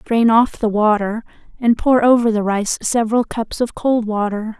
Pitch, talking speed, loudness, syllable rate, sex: 225 Hz, 185 wpm, -17 LUFS, 4.6 syllables/s, female